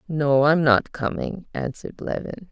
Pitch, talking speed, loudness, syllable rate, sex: 155 Hz, 145 wpm, -22 LUFS, 4.4 syllables/s, female